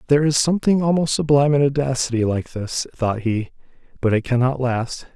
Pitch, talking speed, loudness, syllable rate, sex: 130 Hz, 175 wpm, -20 LUFS, 5.7 syllables/s, male